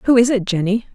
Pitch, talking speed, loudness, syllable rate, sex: 220 Hz, 255 wpm, -17 LUFS, 6.0 syllables/s, female